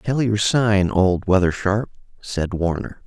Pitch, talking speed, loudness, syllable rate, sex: 100 Hz, 155 wpm, -20 LUFS, 3.7 syllables/s, male